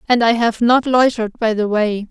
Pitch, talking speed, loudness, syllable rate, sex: 230 Hz, 230 wpm, -16 LUFS, 5.2 syllables/s, female